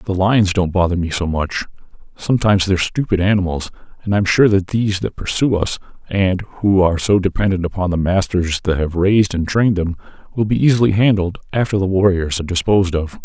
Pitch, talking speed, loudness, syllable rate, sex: 95 Hz, 205 wpm, -17 LUFS, 6.1 syllables/s, male